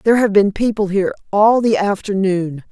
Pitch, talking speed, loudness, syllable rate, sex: 200 Hz, 175 wpm, -16 LUFS, 5.5 syllables/s, female